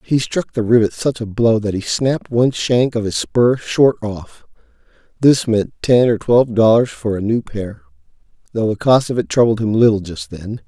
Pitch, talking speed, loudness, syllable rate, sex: 110 Hz, 200 wpm, -16 LUFS, 4.9 syllables/s, male